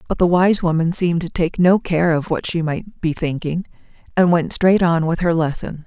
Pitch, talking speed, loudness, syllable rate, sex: 170 Hz, 225 wpm, -18 LUFS, 5.0 syllables/s, female